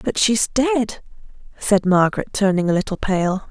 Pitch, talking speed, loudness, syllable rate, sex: 195 Hz, 155 wpm, -19 LUFS, 4.6 syllables/s, female